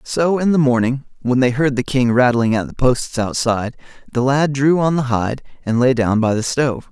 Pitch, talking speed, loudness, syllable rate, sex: 130 Hz, 225 wpm, -17 LUFS, 5.1 syllables/s, male